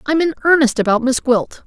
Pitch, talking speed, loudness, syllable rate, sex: 265 Hz, 215 wpm, -15 LUFS, 5.5 syllables/s, female